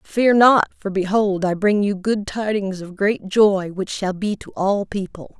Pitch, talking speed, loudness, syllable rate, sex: 200 Hz, 200 wpm, -19 LUFS, 4.1 syllables/s, female